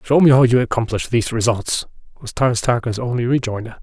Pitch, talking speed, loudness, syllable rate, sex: 120 Hz, 190 wpm, -18 LUFS, 5.9 syllables/s, male